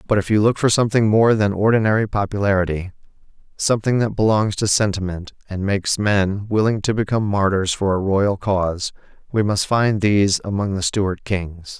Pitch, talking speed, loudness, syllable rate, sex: 100 Hz, 165 wpm, -19 LUFS, 5.4 syllables/s, male